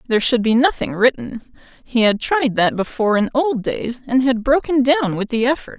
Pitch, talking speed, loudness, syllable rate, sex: 245 Hz, 205 wpm, -17 LUFS, 5.1 syllables/s, female